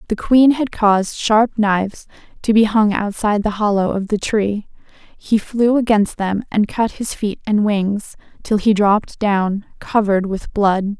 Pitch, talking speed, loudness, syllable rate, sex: 210 Hz, 175 wpm, -17 LUFS, 4.3 syllables/s, female